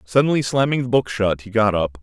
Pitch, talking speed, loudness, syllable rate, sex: 115 Hz, 235 wpm, -19 LUFS, 5.8 syllables/s, male